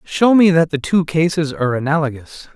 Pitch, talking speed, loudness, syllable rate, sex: 155 Hz, 190 wpm, -16 LUFS, 5.4 syllables/s, male